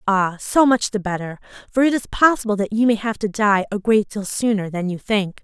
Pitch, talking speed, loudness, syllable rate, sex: 210 Hz, 245 wpm, -19 LUFS, 5.4 syllables/s, female